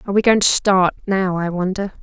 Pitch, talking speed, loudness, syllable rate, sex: 190 Hz, 235 wpm, -17 LUFS, 5.9 syllables/s, female